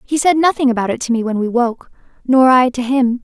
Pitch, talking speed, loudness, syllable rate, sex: 250 Hz, 260 wpm, -15 LUFS, 5.9 syllables/s, female